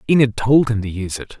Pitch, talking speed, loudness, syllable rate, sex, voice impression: 115 Hz, 255 wpm, -18 LUFS, 6.7 syllables/s, male, masculine, adult-like, slightly powerful, slightly halting, slightly refreshing, slightly sincere